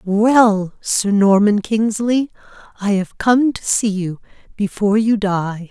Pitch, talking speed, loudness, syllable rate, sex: 210 Hz, 135 wpm, -16 LUFS, 3.6 syllables/s, female